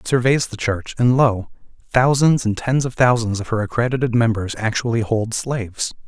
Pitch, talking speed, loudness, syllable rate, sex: 120 Hz, 180 wpm, -19 LUFS, 5.2 syllables/s, male